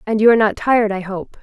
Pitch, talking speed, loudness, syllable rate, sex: 215 Hz, 250 wpm, -16 LUFS, 6.2 syllables/s, female